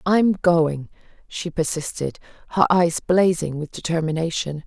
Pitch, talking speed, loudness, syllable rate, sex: 165 Hz, 115 wpm, -21 LUFS, 4.2 syllables/s, female